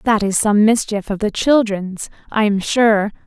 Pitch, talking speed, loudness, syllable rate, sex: 210 Hz, 185 wpm, -16 LUFS, 4.1 syllables/s, female